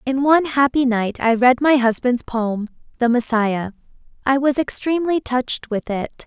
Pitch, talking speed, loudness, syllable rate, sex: 250 Hz, 165 wpm, -19 LUFS, 4.7 syllables/s, female